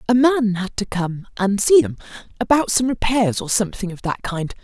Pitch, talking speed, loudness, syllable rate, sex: 215 Hz, 180 wpm, -19 LUFS, 5.1 syllables/s, female